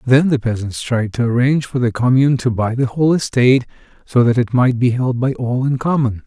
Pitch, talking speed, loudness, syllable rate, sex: 125 Hz, 230 wpm, -16 LUFS, 5.7 syllables/s, male